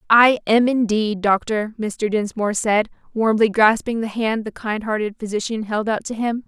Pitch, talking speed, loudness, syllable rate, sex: 220 Hz, 175 wpm, -20 LUFS, 4.8 syllables/s, female